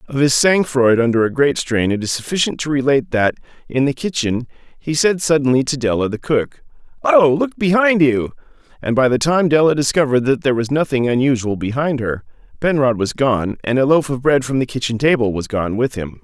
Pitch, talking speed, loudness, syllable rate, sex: 135 Hz, 210 wpm, -17 LUFS, 5.6 syllables/s, male